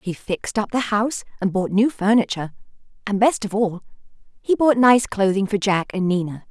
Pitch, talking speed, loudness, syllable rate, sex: 210 Hz, 195 wpm, -20 LUFS, 5.5 syllables/s, female